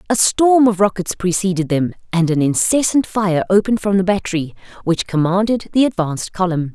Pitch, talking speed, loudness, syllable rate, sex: 190 Hz, 170 wpm, -17 LUFS, 5.6 syllables/s, female